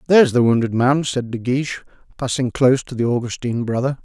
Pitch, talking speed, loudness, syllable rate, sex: 125 Hz, 210 wpm, -19 LUFS, 6.8 syllables/s, male